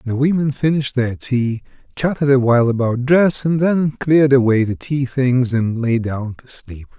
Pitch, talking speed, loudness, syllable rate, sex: 130 Hz, 190 wpm, -17 LUFS, 4.7 syllables/s, male